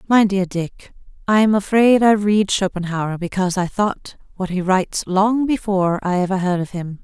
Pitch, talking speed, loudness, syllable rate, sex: 195 Hz, 190 wpm, -18 LUFS, 4.9 syllables/s, female